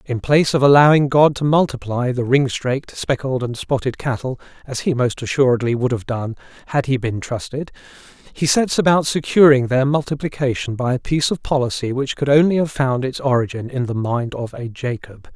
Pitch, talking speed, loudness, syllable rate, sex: 130 Hz, 190 wpm, -18 LUFS, 5.5 syllables/s, male